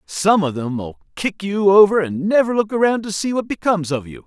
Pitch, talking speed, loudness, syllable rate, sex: 185 Hz, 240 wpm, -18 LUFS, 5.6 syllables/s, male